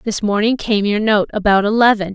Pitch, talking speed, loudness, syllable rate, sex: 210 Hz, 195 wpm, -15 LUFS, 5.5 syllables/s, female